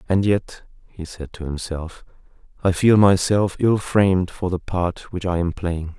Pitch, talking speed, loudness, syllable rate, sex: 90 Hz, 180 wpm, -20 LUFS, 4.2 syllables/s, male